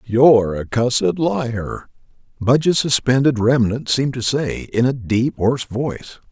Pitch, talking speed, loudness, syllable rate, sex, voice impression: 125 Hz, 140 wpm, -18 LUFS, 4.5 syllables/s, male, very masculine, middle-aged, thick, tensed, slightly powerful, bright, soft, clear, fluent, slightly raspy, very cool, very intellectual, refreshing, very sincere, calm, very mature, very friendly, very reassuring, unique, slightly elegant, very wild, slightly sweet, very lively, kind, slightly intense